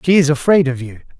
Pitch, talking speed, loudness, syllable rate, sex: 150 Hz, 250 wpm, -14 LUFS, 6.5 syllables/s, male